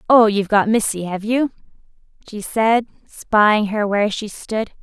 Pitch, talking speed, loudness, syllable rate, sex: 215 Hz, 160 wpm, -18 LUFS, 4.4 syllables/s, female